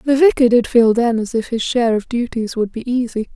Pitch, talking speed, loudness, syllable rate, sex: 235 Hz, 250 wpm, -16 LUFS, 5.5 syllables/s, female